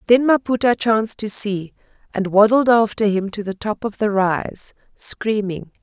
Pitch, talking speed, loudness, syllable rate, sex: 210 Hz, 165 wpm, -19 LUFS, 4.4 syllables/s, female